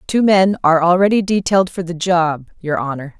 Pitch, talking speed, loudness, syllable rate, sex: 175 Hz, 190 wpm, -16 LUFS, 5.6 syllables/s, female